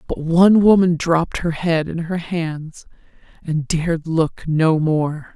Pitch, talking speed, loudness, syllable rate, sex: 165 Hz, 155 wpm, -18 LUFS, 3.9 syllables/s, female